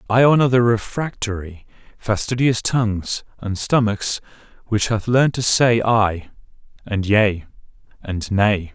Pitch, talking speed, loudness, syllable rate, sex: 110 Hz, 125 wpm, -19 LUFS, 4.1 syllables/s, male